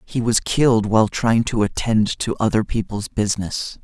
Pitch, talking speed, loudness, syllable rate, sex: 110 Hz, 170 wpm, -19 LUFS, 4.9 syllables/s, male